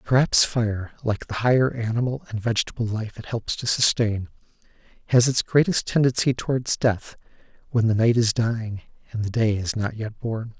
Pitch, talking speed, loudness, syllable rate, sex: 115 Hz, 175 wpm, -23 LUFS, 5.1 syllables/s, male